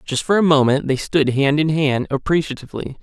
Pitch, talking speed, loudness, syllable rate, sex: 145 Hz, 200 wpm, -18 LUFS, 5.6 syllables/s, male